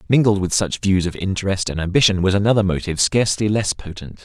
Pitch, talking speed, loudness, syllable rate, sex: 95 Hz, 200 wpm, -18 LUFS, 6.5 syllables/s, male